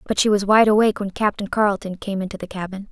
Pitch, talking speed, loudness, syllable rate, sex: 200 Hz, 245 wpm, -20 LUFS, 6.8 syllables/s, female